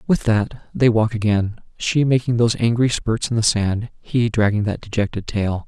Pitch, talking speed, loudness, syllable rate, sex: 110 Hz, 190 wpm, -20 LUFS, 4.8 syllables/s, male